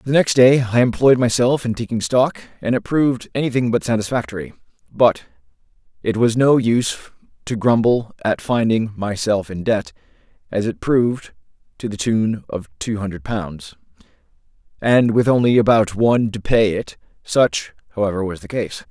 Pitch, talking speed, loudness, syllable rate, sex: 110 Hz, 160 wpm, -18 LUFS, 5.1 syllables/s, male